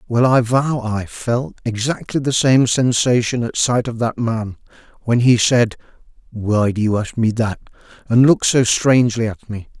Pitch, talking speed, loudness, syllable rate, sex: 120 Hz, 180 wpm, -17 LUFS, 4.5 syllables/s, male